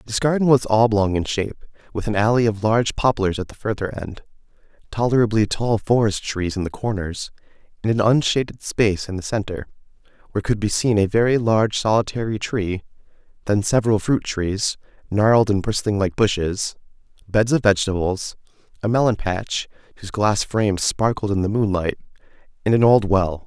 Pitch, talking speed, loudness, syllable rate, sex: 105 Hz, 165 wpm, -20 LUFS, 5.5 syllables/s, male